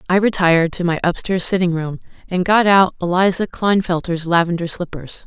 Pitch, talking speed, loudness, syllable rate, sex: 180 Hz, 160 wpm, -17 LUFS, 5.5 syllables/s, female